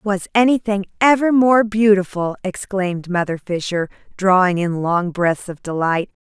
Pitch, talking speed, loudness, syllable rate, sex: 195 Hz, 135 wpm, -18 LUFS, 4.5 syllables/s, female